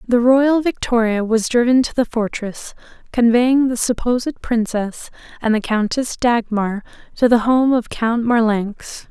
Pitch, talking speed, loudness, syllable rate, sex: 235 Hz, 145 wpm, -17 LUFS, 4.2 syllables/s, female